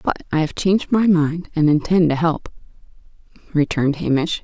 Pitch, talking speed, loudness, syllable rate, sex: 160 Hz, 160 wpm, -19 LUFS, 5.2 syllables/s, female